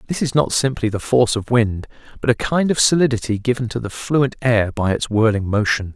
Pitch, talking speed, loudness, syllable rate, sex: 120 Hz, 220 wpm, -18 LUFS, 5.6 syllables/s, male